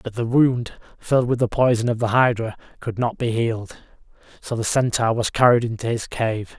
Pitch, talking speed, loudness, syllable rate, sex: 115 Hz, 200 wpm, -21 LUFS, 5.2 syllables/s, male